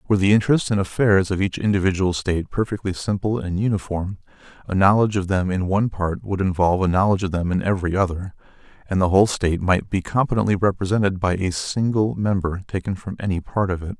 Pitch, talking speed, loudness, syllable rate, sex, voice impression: 95 Hz, 200 wpm, -21 LUFS, 6.5 syllables/s, male, very masculine, very adult-like, very middle-aged, very thick, slightly relaxed, powerful, slightly dark, soft, slightly muffled, fluent, very cool, intellectual, very sincere, very calm, very mature, very friendly, very reassuring, very unique, very elegant, wild, sweet, very kind, slightly modest